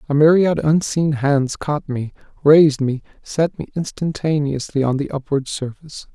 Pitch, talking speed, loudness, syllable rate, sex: 145 Hz, 145 wpm, -18 LUFS, 4.7 syllables/s, male